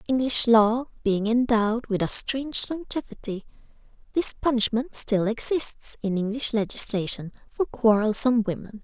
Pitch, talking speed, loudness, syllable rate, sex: 230 Hz, 120 wpm, -23 LUFS, 4.8 syllables/s, female